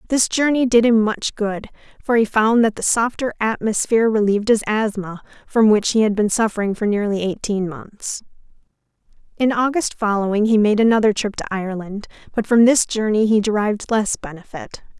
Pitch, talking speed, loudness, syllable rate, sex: 215 Hz, 170 wpm, -18 LUFS, 5.3 syllables/s, female